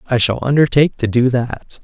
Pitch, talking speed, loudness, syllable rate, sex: 125 Hz, 195 wpm, -15 LUFS, 5.5 syllables/s, male